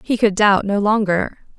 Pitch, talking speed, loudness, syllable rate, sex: 205 Hz, 190 wpm, -17 LUFS, 4.6 syllables/s, female